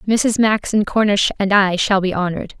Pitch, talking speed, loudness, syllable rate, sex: 200 Hz, 210 wpm, -16 LUFS, 5.1 syllables/s, female